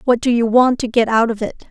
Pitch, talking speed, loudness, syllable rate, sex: 235 Hz, 315 wpm, -16 LUFS, 5.8 syllables/s, female